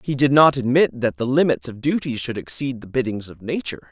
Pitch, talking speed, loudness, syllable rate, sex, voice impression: 125 Hz, 230 wpm, -20 LUFS, 5.8 syllables/s, male, masculine, middle-aged, tensed, powerful, slightly hard, muffled, intellectual, mature, friendly, wild, lively, slightly strict